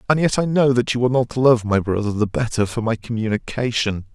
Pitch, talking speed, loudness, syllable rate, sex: 120 Hz, 230 wpm, -19 LUFS, 5.6 syllables/s, male